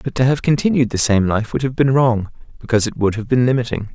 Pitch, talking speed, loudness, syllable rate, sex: 120 Hz, 260 wpm, -17 LUFS, 6.4 syllables/s, male